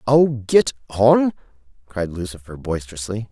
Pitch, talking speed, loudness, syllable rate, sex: 110 Hz, 110 wpm, -20 LUFS, 4.6 syllables/s, male